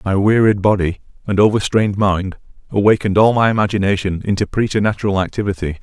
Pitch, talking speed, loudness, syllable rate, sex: 100 Hz, 135 wpm, -16 LUFS, 6.5 syllables/s, male